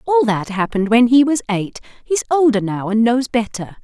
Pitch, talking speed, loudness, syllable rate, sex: 235 Hz, 205 wpm, -17 LUFS, 5.4 syllables/s, female